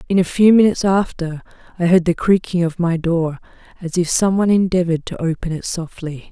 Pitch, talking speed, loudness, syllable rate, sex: 175 Hz, 200 wpm, -17 LUFS, 5.8 syllables/s, female